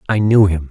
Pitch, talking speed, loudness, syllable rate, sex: 95 Hz, 255 wpm, -13 LUFS, 5.7 syllables/s, male